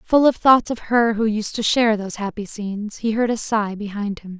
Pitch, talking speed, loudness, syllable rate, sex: 215 Hz, 245 wpm, -20 LUFS, 5.4 syllables/s, female